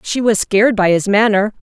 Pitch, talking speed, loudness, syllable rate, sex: 210 Hz, 215 wpm, -14 LUFS, 5.5 syllables/s, female